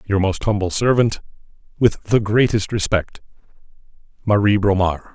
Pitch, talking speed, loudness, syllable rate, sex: 105 Hz, 115 wpm, -18 LUFS, 4.7 syllables/s, male